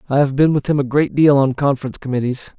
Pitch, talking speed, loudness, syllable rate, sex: 135 Hz, 255 wpm, -17 LUFS, 6.9 syllables/s, male